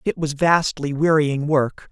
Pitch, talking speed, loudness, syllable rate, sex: 150 Hz, 155 wpm, -19 LUFS, 3.9 syllables/s, male